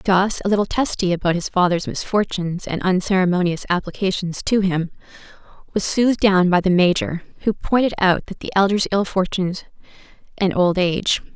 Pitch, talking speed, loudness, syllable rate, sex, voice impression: 185 Hz, 155 wpm, -19 LUFS, 5.5 syllables/s, female, very feminine, young, very thin, slightly relaxed, slightly weak, slightly bright, soft, clear, fluent, slightly raspy, very cute, intellectual, very refreshing, very sincere, calm, friendly, reassuring, slightly unique, elegant, very sweet, slightly lively, very kind, modest